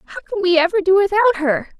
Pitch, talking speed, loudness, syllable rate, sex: 370 Hz, 235 wpm, -16 LUFS, 7.5 syllables/s, female